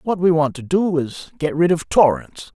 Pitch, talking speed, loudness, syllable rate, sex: 160 Hz, 230 wpm, -18 LUFS, 5.0 syllables/s, male